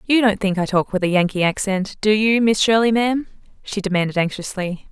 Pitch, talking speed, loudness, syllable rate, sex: 205 Hz, 210 wpm, -19 LUFS, 5.7 syllables/s, female